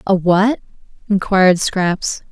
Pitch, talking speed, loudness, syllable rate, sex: 190 Hz, 105 wpm, -15 LUFS, 3.8 syllables/s, female